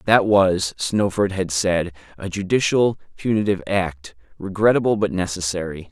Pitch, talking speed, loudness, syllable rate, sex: 95 Hz, 120 wpm, -20 LUFS, 4.7 syllables/s, male